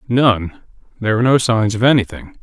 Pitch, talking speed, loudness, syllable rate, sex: 110 Hz, 150 wpm, -15 LUFS, 6.0 syllables/s, male